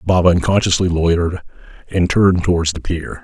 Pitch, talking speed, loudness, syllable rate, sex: 85 Hz, 150 wpm, -16 LUFS, 5.7 syllables/s, male